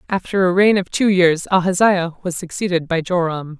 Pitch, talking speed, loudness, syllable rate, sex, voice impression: 180 Hz, 185 wpm, -17 LUFS, 5.2 syllables/s, female, very feminine, very adult-like, slightly thin, tensed, slightly powerful, slightly bright, hard, very clear, fluent, raspy, cool, very intellectual, very refreshing, sincere, calm, very friendly, reassuring, unique, elegant, very wild, sweet, very lively, kind, slightly intense, slightly light